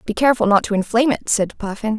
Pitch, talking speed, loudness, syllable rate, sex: 220 Hz, 240 wpm, -18 LUFS, 7.0 syllables/s, female